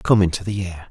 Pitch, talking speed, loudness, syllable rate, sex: 95 Hz, 265 wpm, -21 LUFS, 5.8 syllables/s, male